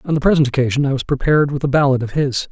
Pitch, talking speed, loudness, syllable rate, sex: 140 Hz, 285 wpm, -17 LUFS, 7.5 syllables/s, male